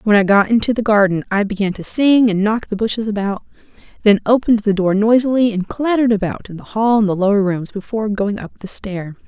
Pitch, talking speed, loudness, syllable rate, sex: 210 Hz, 225 wpm, -16 LUFS, 6.0 syllables/s, female